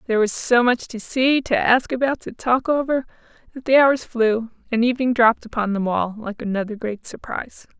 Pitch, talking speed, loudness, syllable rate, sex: 235 Hz, 200 wpm, -20 LUFS, 5.4 syllables/s, female